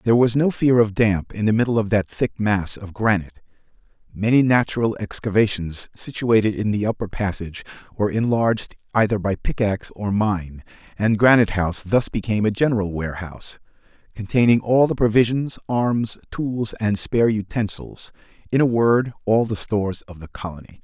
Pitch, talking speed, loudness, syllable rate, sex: 105 Hz, 160 wpm, -21 LUFS, 5.5 syllables/s, male